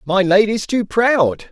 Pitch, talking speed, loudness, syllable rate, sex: 200 Hz, 160 wpm, -16 LUFS, 3.6 syllables/s, male